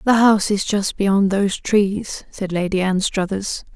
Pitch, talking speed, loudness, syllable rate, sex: 200 Hz, 160 wpm, -19 LUFS, 4.3 syllables/s, female